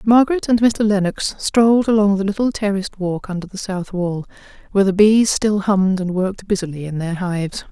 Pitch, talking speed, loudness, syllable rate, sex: 200 Hz, 195 wpm, -18 LUFS, 5.7 syllables/s, female